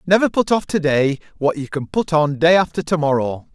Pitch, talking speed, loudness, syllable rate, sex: 155 Hz, 235 wpm, -18 LUFS, 5.4 syllables/s, male